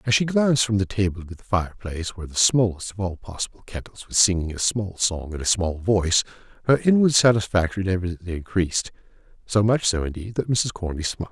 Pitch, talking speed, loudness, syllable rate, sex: 100 Hz, 195 wpm, -22 LUFS, 6.1 syllables/s, male